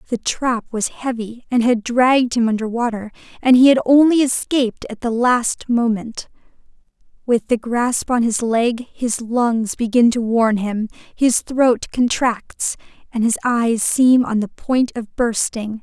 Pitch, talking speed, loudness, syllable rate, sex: 235 Hz, 165 wpm, -18 LUFS, 4.0 syllables/s, female